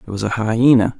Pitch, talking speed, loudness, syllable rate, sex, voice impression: 110 Hz, 240 wpm, -16 LUFS, 5.8 syllables/s, male, very masculine, very adult-like, slightly middle-aged, very thick, very relaxed, very weak, very dark, very soft, very muffled, slightly fluent, raspy, cool, very intellectual, slightly refreshing, sincere, very calm, slightly friendly, very reassuring, slightly unique, elegant, wild, sweet, kind, very modest